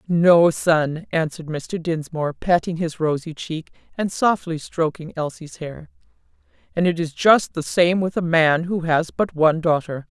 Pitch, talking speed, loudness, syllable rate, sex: 165 Hz, 165 wpm, -20 LUFS, 4.4 syllables/s, female